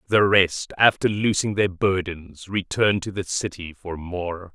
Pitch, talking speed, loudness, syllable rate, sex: 95 Hz, 160 wpm, -22 LUFS, 4.2 syllables/s, male